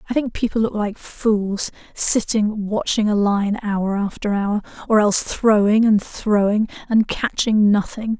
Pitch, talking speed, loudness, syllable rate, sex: 210 Hz, 155 wpm, -19 LUFS, 4.1 syllables/s, female